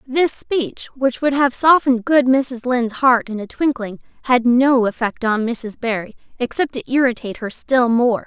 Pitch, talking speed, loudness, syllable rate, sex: 250 Hz, 180 wpm, -18 LUFS, 4.7 syllables/s, female